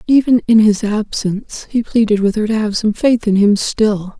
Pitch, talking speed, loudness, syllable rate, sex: 215 Hz, 215 wpm, -15 LUFS, 4.9 syllables/s, female